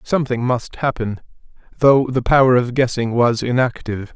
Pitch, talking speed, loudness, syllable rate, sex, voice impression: 125 Hz, 145 wpm, -17 LUFS, 5.2 syllables/s, male, masculine, adult-like, slightly tensed, slightly powerful, muffled, slightly halting, intellectual, slightly mature, friendly, slightly wild, lively, slightly kind